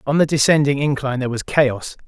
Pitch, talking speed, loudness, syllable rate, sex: 140 Hz, 200 wpm, -18 LUFS, 6.4 syllables/s, male